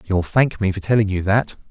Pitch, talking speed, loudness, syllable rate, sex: 100 Hz, 245 wpm, -19 LUFS, 5.3 syllables/s, male